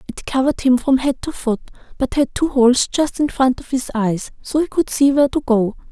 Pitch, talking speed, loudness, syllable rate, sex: 260 Hz, 245 wpm, -18 LUFS, 5.5 syllables/s, female